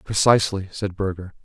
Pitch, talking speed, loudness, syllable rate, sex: 95 Hz, 125 wpm, -21 LUFS, 5.7 syllables/s, male